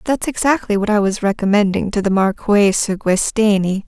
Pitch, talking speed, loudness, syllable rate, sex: 205 Hz, 170 wpm, -16 LUFS, 5.1 syllables/s, female